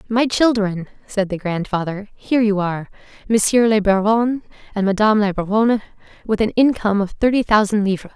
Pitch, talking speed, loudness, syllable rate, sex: 210 Hz, 160 wpm, -18 LUFS, 5.8 syllables/s, female